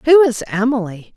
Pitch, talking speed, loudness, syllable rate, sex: 245 Hz, 155 wpm, -16 LUFS, 5.0 syllables/s, female